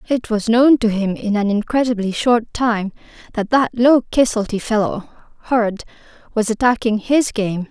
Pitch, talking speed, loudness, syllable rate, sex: 225 Hz, 155 wpm, -17 LUFS, 4.6 syllables/s, female